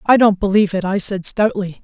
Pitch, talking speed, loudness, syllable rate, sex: 200 Hz, 230 wpm, -16 LUFS, 5.8 syllables/s, female